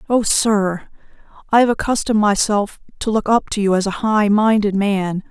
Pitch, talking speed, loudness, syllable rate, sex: 210 Hz, 180 wpm, -17 LUFS, 4.9 syllables/s, female